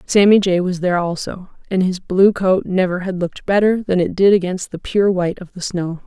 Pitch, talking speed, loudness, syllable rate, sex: 185 Hz, 230 wpm, -17 LUFS, 5.4 syllables/s, female